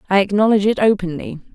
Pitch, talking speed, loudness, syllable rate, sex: 200 Hz, 155 wpm, -16 LUFS, 7.3 syllables/s, female